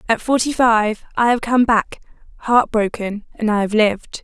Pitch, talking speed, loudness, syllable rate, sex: 225 Hz, 185 wpm, -17 LUFS, 4.7 syllables/s, female